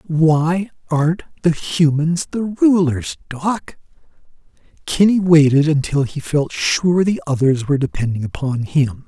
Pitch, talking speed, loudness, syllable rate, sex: 155 Hz, 125 wpm, -17 LUFS, 4.1 syllables/s, male